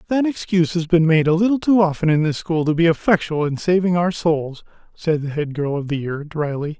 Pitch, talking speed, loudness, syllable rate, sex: 165 Hz, 240 wpm, -19 LUFS, 5.6 syllables/s, male